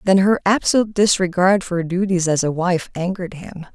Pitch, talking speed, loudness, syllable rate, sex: 185 Hz, 190 wpm, -18 LUFS, 6.0 syllables/s, female